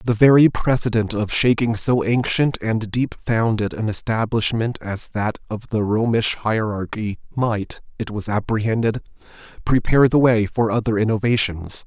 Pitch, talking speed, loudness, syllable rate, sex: 110 Hz, 140 wpm, -20 LUFS, 4.6 syllables/s, male